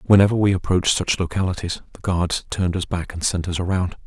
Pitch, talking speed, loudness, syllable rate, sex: 90 Hz, 205 wpm, -21 LUFS, 6.1 syllables/s, male